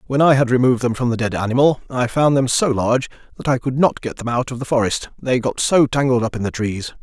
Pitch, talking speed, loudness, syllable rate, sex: 125 Hz, 275 wpm, -18 LUFS, 6.1 syllables/s, male